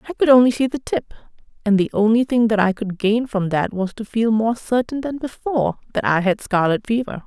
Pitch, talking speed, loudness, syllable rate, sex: 225 Hz, 230 wpm, -19 LUFS, 5.5 syllables/s, female